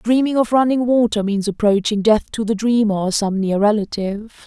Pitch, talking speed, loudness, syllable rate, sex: 215 Hz, 190 wpm, -17 LUFS, 5.2 syllables/s, female